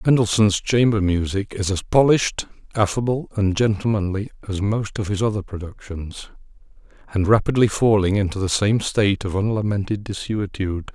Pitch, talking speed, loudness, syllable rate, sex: 105 Hz, 135 wpm, -21 LUFS, 5.3 syllables/s, male